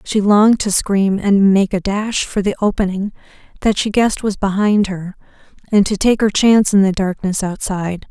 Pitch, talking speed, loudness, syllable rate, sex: 200 Hz, 190 wpm, -15 LUFS, 5.1 syllables/s, female